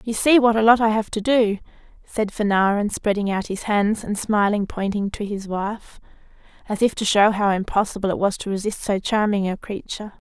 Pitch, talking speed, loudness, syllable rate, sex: 210 Hz, 205 wpm, -21 LUFS, 5.4 syllables/s, female